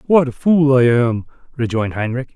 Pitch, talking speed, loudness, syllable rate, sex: 130 Hz, 180 wpm, -16 LUFS, 5.3 syllables/s, male